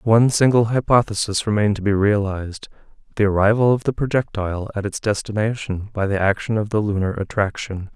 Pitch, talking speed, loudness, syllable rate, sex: 105 Hz, 165 wpm, -20 LUFS, 5.9 syllables/s, male